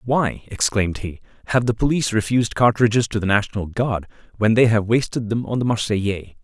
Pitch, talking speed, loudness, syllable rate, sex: 110 Hz, 185 wpm, -20 LUFS, 5.9 syllables/s, male